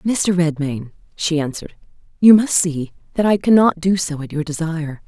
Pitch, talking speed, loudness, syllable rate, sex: 170 Hz, 190 wpm, -17 LUFS, 5.2 syllables/s, female